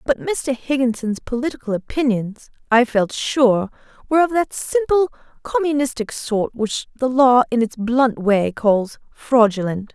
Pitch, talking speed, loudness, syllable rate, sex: 245 Hz, 140 wpm, -19 LUFS, 4.3 syllables/s, female